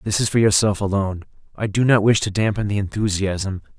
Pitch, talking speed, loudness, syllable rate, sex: 100 Hz, 205 wpm, -20 LUFS, 5.9 syllables/s, male